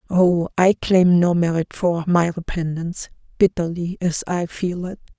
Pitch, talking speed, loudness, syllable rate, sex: 175 Hz, 150 wpm, -20 LUFS, 4.4 syllables/s, female